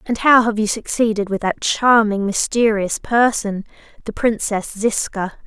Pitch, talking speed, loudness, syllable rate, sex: 215 Hz, 145 wpm, -18 LUFS, 4.3 syllables/s, female